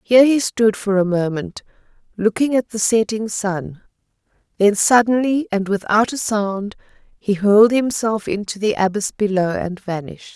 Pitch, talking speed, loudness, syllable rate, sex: 210 Hz, 150 wpm, -18 LUFS, 4.8 syllables/s, female